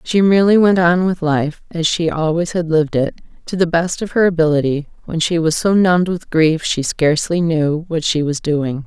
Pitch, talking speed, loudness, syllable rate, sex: 165 Hz, 215 wpm, -16 LUFS, 5.1 syllables/s, female